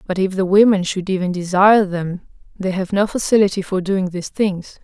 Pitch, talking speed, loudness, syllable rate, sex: 190 Hz, 200 wpm, -17 LUFS, 5.4 syllables/s, female